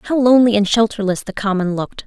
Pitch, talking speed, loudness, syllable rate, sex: 210 Hz, 205 wpm, -16 LUFS, 6.4 syllables/s, female